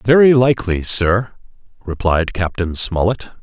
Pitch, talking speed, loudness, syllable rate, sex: 100 Hz, 105 wpm, -16 LUFS, 4.4 syllables/s, male